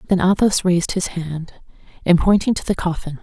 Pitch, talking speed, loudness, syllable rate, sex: 180 Hz, 185 wpm, -18 LUFS, 5.4 syllables/s, female